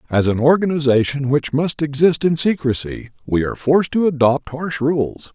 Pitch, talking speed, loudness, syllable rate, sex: 145 Hz, 170 wpm, -18 LUFS, 5.0 syllables/s, male